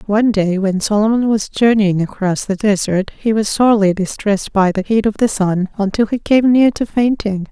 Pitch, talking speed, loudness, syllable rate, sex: 210 Hz, 200 wpm, -15 LUFS, 5.2 syllables/s, female